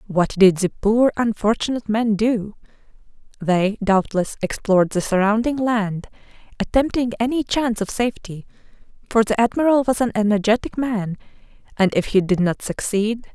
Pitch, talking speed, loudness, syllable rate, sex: 215 Hz, 140 wpm, -20 LUFS, 5.1 syllables/s, female